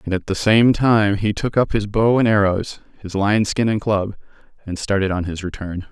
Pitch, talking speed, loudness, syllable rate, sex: 100 Hz, 225 wpm, -18 LUFS, 4.9 syllables/s, male